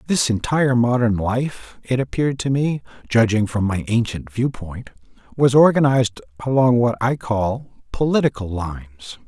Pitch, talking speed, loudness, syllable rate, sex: 120 Hz, 135 wpm, -19 LUFS, 4.8 syllables/s, male